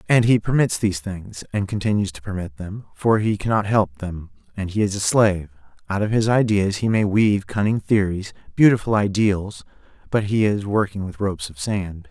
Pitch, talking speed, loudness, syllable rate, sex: 100 Hz, 195 wpm, -21 LUFS, 5.3 syllables/s, male